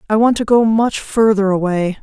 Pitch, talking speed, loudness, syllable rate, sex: 210 Hz, 205 wpm, -15 LUFS, 5.0 syllables/s, female